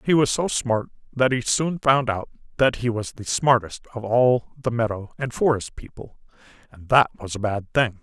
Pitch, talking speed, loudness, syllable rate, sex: 120 Hz, 200 wpm, -22 LUFS, 4.7 syllables/s, male